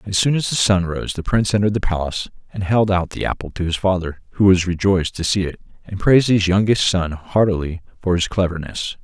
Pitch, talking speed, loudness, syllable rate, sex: 95 Hz, 225 wpm, -19 LUFS, 6.1 syllables/s, male